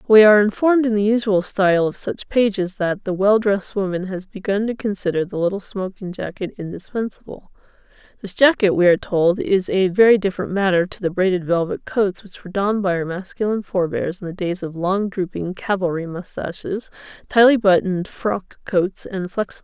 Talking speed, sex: 185 wpm, female